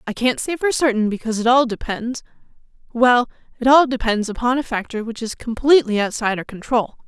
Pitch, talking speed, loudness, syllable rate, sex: 240 Hz, 180 wpm, -19 LUFS, 6.0 syllables/s, female